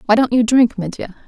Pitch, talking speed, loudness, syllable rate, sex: 225 Hz, 235 wpm, -16 LUFS, 5.9 syllables/s, female